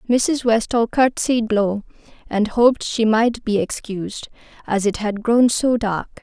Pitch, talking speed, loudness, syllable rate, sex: 225 Hz, 155 wpm, -19 LUFS, 4.0 syllables/s, female